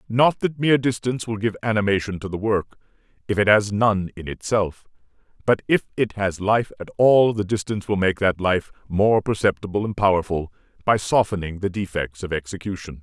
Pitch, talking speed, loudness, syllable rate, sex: 100 Hz, 180 wpm, -22 LUFS, 5.4 syllables/s, male